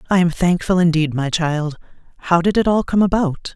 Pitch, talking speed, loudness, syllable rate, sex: 175 Hz, 200 wpm, -17 LUFS, 5.3 syllables/s, female